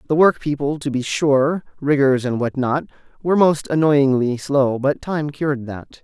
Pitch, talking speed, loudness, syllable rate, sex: 140 Hz, 150 wpm, -19 LUFS, 4.6 syllables/s, male